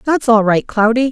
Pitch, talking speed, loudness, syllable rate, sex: 235 Hz, 215 wpm, -13 LUFS, 4.9 syllables/s, female